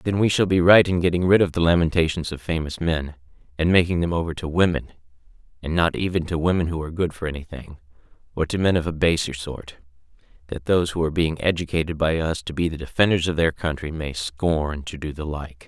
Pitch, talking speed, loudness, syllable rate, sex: 80 Hz, 220 wpm, -22 LUFS, 5.2 syllables/s, male